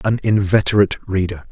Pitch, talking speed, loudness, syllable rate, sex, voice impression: 100 Hz, 120 wpm, -17 LUFS, 5.8 syllables/s, male, very masculine, very adult-like, middle-aged, very thick, tensed, very powerful, bright, soft, clear, fluent, very cool, intellectual, refreshing, sincere, very calm, very mature, friendly, reassuring, slightly unique, slightly elegant, wild, sweet, slightly lively, kind